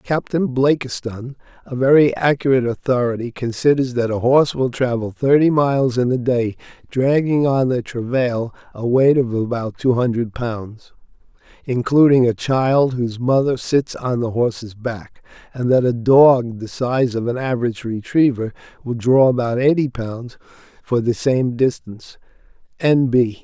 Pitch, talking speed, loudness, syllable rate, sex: 125 Hz, 145 wpm, -18 LUFS, 4.6 syllables/s, male